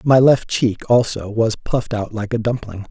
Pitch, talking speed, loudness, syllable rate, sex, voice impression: 115 Hz, 205 wpm, -18 LUFS, 4.6 syllables/s, male, masculine, slightly old, slightly thick, cool, calm, friendly, slightly elegant